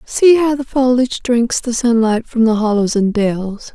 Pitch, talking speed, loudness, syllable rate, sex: 235 Hz, 190 wpm, -15 LUFS, 4.4 syllables/s, female